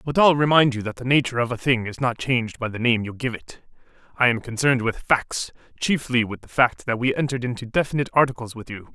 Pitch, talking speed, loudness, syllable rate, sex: 125 Hz, 240 wpm, -22 LUFS, 6.4 syllables/s, male